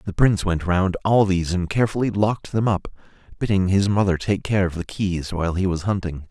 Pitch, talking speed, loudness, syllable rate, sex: 95 Hz, 220 wpm, -21 LUFS, 5.9 syllables/s, male